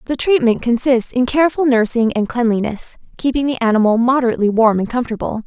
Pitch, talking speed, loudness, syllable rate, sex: 240 Hz, 165 wpm, -16 LUFS, 6.3 syllables/s, female